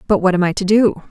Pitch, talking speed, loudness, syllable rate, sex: 195 Hz, 325 wpm, -15 LUFS, 6.7 syllables/s, female